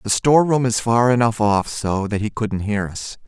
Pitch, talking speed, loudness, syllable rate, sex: 115 Hz, 220 wpm, -19 LUFS, 4.9 syllables/s, male